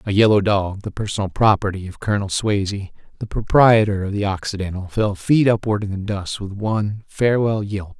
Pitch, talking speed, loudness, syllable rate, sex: 100 Hz, 180 wpm, -20 LUFS, 5.5 syllables/s, male